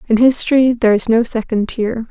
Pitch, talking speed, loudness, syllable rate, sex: 230 Hz, 200 wpm, -15 LUFS, 5.6 syllables/s, female